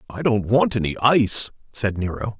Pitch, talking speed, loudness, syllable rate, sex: 110 Hz, 175 wpm, -21 LUFS, 5.2 syllables/s, male